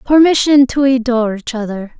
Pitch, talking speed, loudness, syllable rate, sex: 250 Hz, 150 wpm, -13 LUFS, 5.3 syllables/s, female